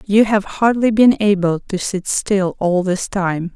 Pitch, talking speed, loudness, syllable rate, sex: 195 Hz, 185 wpm, -16 LUFS, 3.9 syllables/s, female